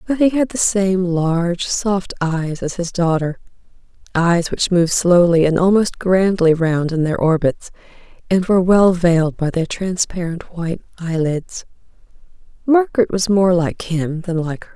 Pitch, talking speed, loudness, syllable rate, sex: 180 Hz, 160 wpm, -17 LUFS, 4.7 syllables/s, female